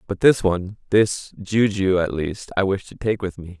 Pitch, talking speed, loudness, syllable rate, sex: 95 Hz, 215 wpm, -21 LUFS, 4.7 syllables/s, male